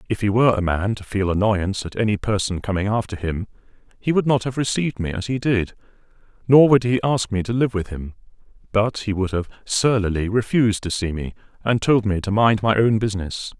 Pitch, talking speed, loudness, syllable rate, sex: 105 Hz, 215 wpm, -21 LUFS, 5.8 syllables/s, male